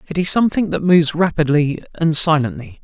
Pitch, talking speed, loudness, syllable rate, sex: 160 Hz, 170 wpm, -16 LUFS, 5.8 syllables/s, male